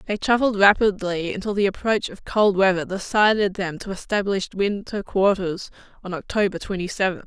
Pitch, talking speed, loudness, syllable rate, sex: 195 Hz, 155 wpm, -22 LUFS, 5.4 syllables/s, female